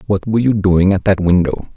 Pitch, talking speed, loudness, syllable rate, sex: 95 Hz, 240 wpm, -14 LUFS, 6.4 syllables/s, male